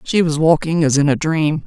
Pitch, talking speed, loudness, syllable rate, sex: 155 Hz, 255 wpm, -16 LUFS, 5.1 syllables/s, female